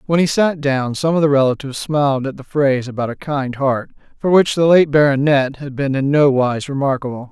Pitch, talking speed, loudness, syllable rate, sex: 140 Hz, 220 wpm, -16 LUFS, 5.5 syllables/s, male